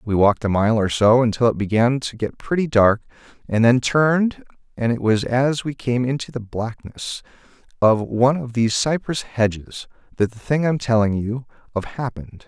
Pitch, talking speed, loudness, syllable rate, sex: 120 Hz, 190 wpm, -20 LUFS, 5.1 syllables/s, male